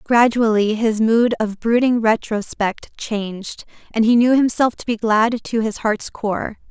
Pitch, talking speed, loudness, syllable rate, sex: 225 Hz, 160 wpm, -18 LUFS, 4.1 syllables/s, female